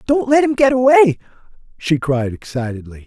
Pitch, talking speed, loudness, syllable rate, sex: 190 Hz, 155 wpm, -15 LUFS, 5.9 syllables/s, male